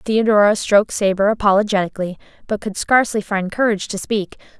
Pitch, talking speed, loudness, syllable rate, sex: 205 Hz, 145 wpm, -18 LUFS, 6.1 syllables/s, female